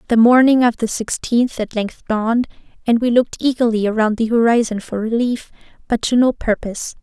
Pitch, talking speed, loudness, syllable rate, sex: 230 Hz, 180 wpm, -17 LUFS, 5.6 syllables/s, female